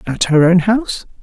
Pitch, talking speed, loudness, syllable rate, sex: 190 Hz, 195 wpm, -13 LUFS, 5.1 syllables/s, male